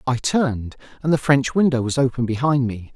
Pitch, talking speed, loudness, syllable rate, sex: 130 Hz, 205 wpm, -20 LUFS, 5.5 syllables/s, male